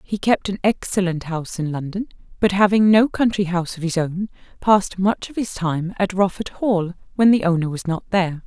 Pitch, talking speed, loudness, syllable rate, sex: 185 Hz, 205 wpm, -20 LUFS, 5.3 syllables/s, female